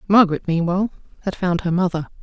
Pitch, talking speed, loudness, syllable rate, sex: 180 Hz, 160 wpm, -20 LUFS, 6.8 syllables/s, female